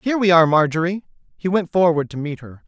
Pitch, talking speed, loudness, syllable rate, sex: 170 Hz, 225 wpm, -18 LUFS, 6.4 syllables/s, male